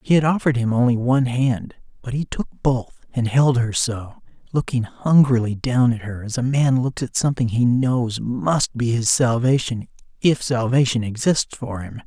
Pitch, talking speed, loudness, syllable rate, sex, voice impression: 125 Hz, 185 wpm, -20 LUFS, 4.7 syllables/s, male, masculine, slightly middle-aged, thick, very tensed, powerful, very bright, slightly hard, clear, very fluent, raspy, cool, intellectual, refreshing, slightly sincere, slightly calm, friendly, slightly reassuring, very unique, slightly elegant, very wild, sweet, very lively, slightly kind, intense